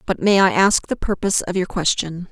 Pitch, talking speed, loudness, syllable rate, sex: 185 Hz, 235 wpm, -18 LUFS, 5.5 syllables/s, female